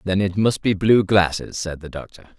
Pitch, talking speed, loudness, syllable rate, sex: 95 Hz, 225 wpm, -19 LUFS, 4.8 syllables/s, male